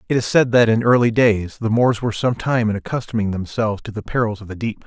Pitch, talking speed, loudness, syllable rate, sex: 110 Hz, 260 wpm, -19 LUFS, 6.2 syllables/s, male